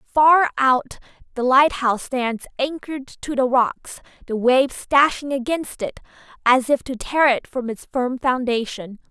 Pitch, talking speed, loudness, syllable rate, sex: 260 Hz, 150 wpm, -20 LUFS, 4.3 syllables/s, female